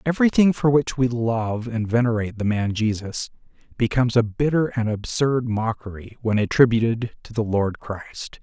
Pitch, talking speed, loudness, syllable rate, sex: 115 Hz, 155 wpm, -22 LUFS, 4.9 syllables/s, male